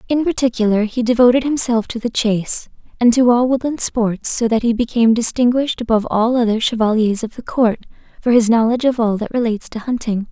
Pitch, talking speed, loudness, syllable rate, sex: 235 Hz, 200 wpm, -16 LUFS, 6.1 syllables/s, female